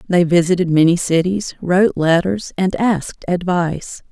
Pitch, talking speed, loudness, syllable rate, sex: 175 Hz, 130 wpm, -16 LUFS, 4.8 syllables/s, female